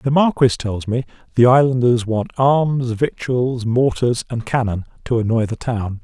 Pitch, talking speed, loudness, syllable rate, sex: 120 Hz, 160 wpm, -18 LUFS, 4.3 syllables/s, male